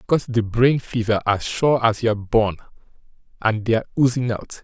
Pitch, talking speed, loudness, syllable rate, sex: 115 Hz, 180 wpm, -20 LUFS, 5.7 syllables/s, male